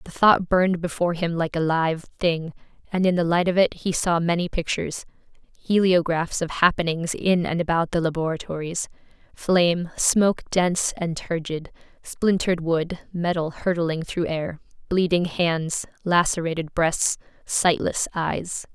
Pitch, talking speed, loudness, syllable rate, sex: 170 Hz, 140 wpm, -23 LUFS, 4.6 syllables/s, female